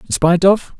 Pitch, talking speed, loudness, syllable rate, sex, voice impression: 175 Hz, 225 wpm, -14 LUFS, 5.5 syllables/s, male, masculine, adult-like, relaxed, slightly weak, slightly soft, slightly muffled, calm, friendly, reassuring, slightly wild, kind, modest